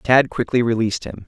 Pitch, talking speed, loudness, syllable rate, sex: 120 Hz, 190 wpm, -19 LUFS, 5.7 syllables/s, male